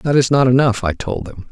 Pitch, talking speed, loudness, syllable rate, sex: 120 Hz, 275 wpm, -16 LUFS, 5.5 syllables/s, male